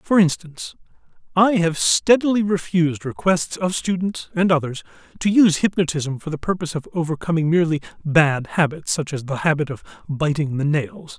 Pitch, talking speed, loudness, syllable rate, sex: 165 Hz, 160 wpm, -20 LUFS, 5.4 syllables/s, male